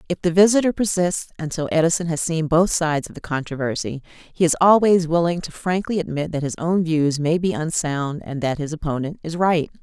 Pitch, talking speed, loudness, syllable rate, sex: 165 Hz, 200 wpm, -20 LUFS, 5.4 syllables/s, female